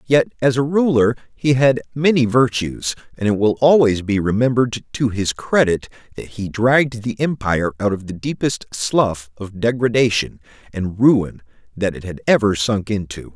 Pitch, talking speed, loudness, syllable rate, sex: 115 Hz, 165 wpm, -18 LUFS, 4.8 syllables/s, male